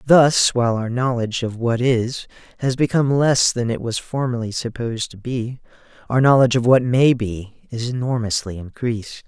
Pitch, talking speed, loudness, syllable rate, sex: 120 Hz, 170 wpm, -19 LUFS, 5.1 syllables/s, male